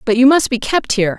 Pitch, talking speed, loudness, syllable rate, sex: 245 Hz, 305 wpm, -14 LUFS, 6.4 syllables/s, female